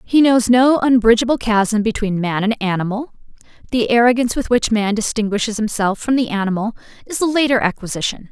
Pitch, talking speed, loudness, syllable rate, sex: 225 Hz, 165 wpm, -17 LUFS, 5.7 syllables/s, female